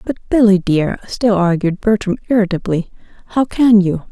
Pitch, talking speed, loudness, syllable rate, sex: 200 Hz, 145 wpm, -15 LUFS, 5.1 syllables/s, female